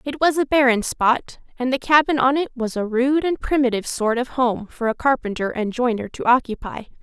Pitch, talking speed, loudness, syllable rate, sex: 250 Hz, 215 wpm, -20 LUFS, 5.3 syllables/s, female